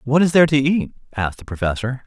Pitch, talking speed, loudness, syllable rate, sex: 135 Hz, 230 wpm, -19 LUFS, 6.6 syllables/s, male